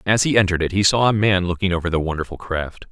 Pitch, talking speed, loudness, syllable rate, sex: 95 Hz, 265 wpm, -19 LUFS, 6.8 syllables/s, male